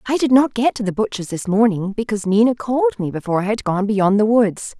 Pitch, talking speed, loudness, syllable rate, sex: 215 Hz, 250 wpm, -18 LUFS, 6.0 syllables/s, female